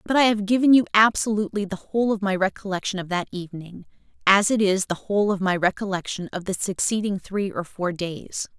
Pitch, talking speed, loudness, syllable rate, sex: 195 Hz, 205 wpm, -22 LUFS, 5.9 syllables/s, female